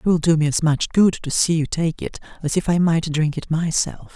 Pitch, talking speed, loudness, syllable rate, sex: 160 Hz, 275 wpm, -20 LUFS, 5.2 syllables/s, male